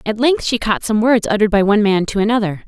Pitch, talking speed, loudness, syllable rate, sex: 215 Hz, 270 wpm, -15 LUFS, 6.7 syllables/s, female